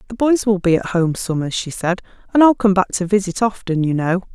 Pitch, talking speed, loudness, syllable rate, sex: 195 Hz, 235 wpm, -18 LUFS, 5.5 syllables/s, female